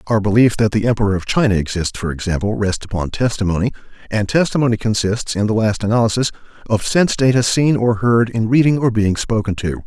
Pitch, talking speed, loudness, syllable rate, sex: 110 Hz, 195 wpm, -17 LUFS, 6.1 syllables/s, male